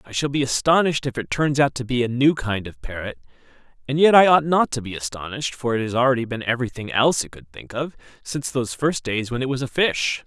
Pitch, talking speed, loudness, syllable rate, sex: 130 Hz, 250 wpm, -21 LUFS, 6.3 syllables/s, male